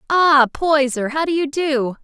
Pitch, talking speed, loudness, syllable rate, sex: 285 Hz, 175 wpm, -17 LUFS, 4.1 syllables/s, female